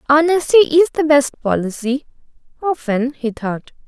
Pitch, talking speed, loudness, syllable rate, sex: 280 Hz, 110 wpm, -16 LUFS, 4.4 syllables/s, female